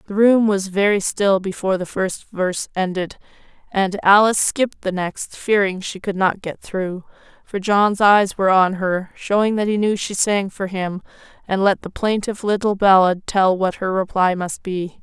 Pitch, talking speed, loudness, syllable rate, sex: 195 Hz, 190 wpm, -19 LUFS, 4.7 syllables/s, female